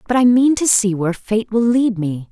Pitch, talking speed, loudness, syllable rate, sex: 215 Hz, 260 wpm, -16 LUFS, 5.1 syllables/s, female